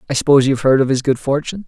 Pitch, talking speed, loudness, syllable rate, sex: 140 Hz, 325 wpm, -15 LUFS, 8.8 syllables/s, male